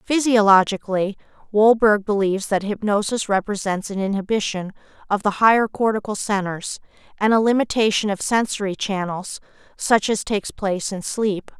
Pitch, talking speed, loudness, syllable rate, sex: 205 Hz, 130 wpm, -20 LUFS, 5.2 syllables/s, female